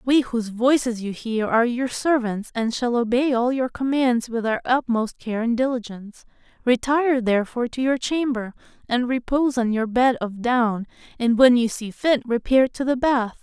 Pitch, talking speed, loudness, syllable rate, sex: 245 Hz, 185 wpm, -22 LUFS, 4.9 syllables/s, female